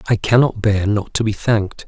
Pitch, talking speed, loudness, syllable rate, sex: 105 Hz, 225 wpm, -17 LUFS, 5.4 syllables/s, male